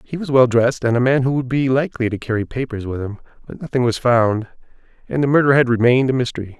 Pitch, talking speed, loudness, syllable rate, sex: 125 Hz, 245 wpm, -18 LUFS, 6.6 syllables/s, male